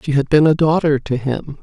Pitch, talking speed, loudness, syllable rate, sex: 145 Hz, 260 wpm, -16 LUFS, 5.3 syllables/s, female